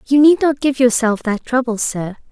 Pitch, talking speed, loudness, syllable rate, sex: 250 Hz, 205 wpm, -16 LUFS, 4.9 syllables/s, female